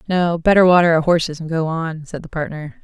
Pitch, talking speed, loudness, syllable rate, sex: 165 Hz, 235 wpm, -17 LUFS, 5.8 syllables/s, female